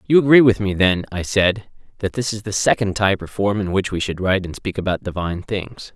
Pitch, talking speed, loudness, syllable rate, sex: 100 Hz, 250 wpm, -19 LUFS, 5.9 syllables/s, male